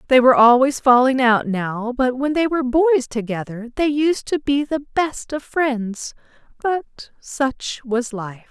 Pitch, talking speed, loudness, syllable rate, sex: 260 Hz, 170 wpm, -19 LUFS, 4.0 syllables/s, female